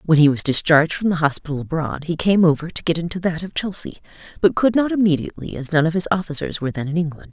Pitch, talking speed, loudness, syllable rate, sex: 165 Hz, 245 wpm, -19 LUFS, 6.8 syllables/s, female